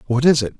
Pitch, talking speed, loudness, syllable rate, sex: 125 Hz, 305 wpm, -16 LUFS, 7.5 syllables/s, male